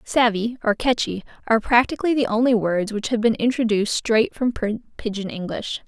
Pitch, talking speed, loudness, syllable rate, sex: 230 Hz, 165 wpm, -21 LUFS, 5.6 syllables/s, female